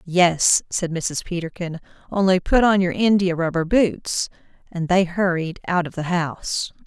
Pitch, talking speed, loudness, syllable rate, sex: 175 Hz, 155 wpm, -21 LUFS, 4.3 syllables/s, female